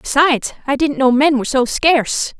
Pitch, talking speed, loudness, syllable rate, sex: 270 Hz, 200 wpm, -15 LUFS, 5.5 syllables/s, female